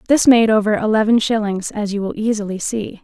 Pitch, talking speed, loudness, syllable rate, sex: 215 Hz, 200 wpm, -17 LUFS, 5.7 syllables/s, female